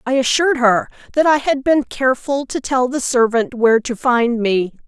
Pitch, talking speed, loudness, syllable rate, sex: 255 Hz, 195 wpm, -16 LUFS, 5.1 syllables/s, female